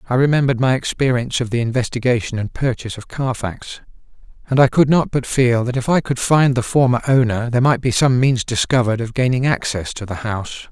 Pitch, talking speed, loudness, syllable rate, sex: 125 Hz, 205 wpm, -18 LUFS, 6.1 syllables/s, male